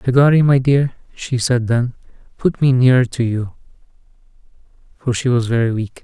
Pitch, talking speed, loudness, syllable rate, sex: 125 Hz, 160 wpm, -16 LUFS, 5.1 syllables/s, male